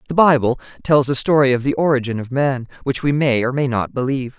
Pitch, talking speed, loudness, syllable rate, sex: 135 Hz, 235 wpm, -18 LUFS, 6.1 syllables/s, female